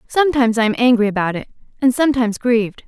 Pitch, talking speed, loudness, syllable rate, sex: 235 Hz, 190 wpm, -16 LUFS, 7.5 syllables/s, female